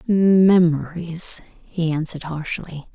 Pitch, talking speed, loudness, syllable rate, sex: 170 Hz, 80 wpm, -19 LUFS, 3.3 syllables/s, female